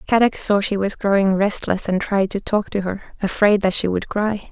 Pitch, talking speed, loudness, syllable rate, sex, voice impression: 200 Hz, 225 wpm, -19 LUFS, 5.0 syllables/s, female, feminine, adult-like, sincere, calm, slightly kind